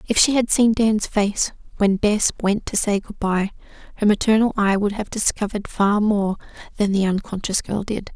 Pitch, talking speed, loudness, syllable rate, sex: 205 Hz, 190 wpm, -20 LUFS, 4.9 syllables/s, female